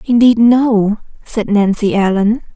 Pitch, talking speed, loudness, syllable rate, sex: 220 Hz, 115 wpm, -13 LUFS, 3.8 syllables/s, female